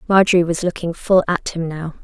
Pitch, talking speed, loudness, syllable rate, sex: 175 Hz, 205 wpm, -18 LUFS, 5.7 syllables/s, female